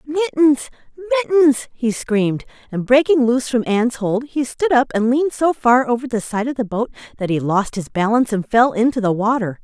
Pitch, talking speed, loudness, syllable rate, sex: 245 Hz, 205 wpm, -18 LUFS, 5.9 syllables/s, female